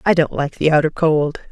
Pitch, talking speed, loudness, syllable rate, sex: 155 Hz, 240 wpm, -17 LUFS, 5.3 syllables/s, female